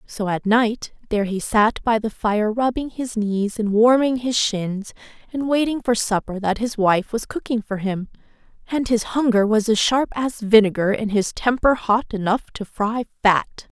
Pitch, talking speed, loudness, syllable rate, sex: 220 Hz, 185 wpm, -20 LUFS, 4.5 syllables/s, female